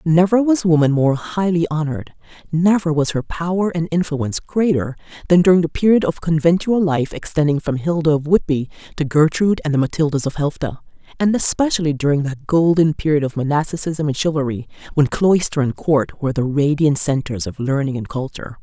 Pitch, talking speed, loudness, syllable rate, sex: 155 Hz, 175 wpm, -18 LUFS, 5.7 syllables/s, female